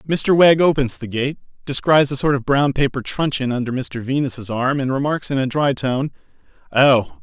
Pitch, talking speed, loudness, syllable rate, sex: 135 Hz, 190 wpm, -18 LUFS, 4.9 syllables/s, male